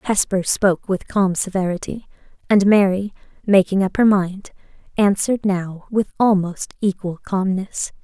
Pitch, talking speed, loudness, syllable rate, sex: 195 Hz, 125 wpm, -19 LUFS, 4.5 syllables/s, female